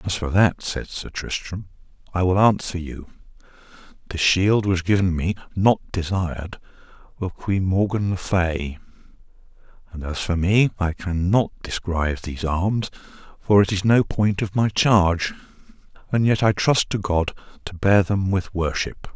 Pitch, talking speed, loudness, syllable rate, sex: 95 Hz, 160 wpm, -21 LUFS, 4.5 syllables/s, male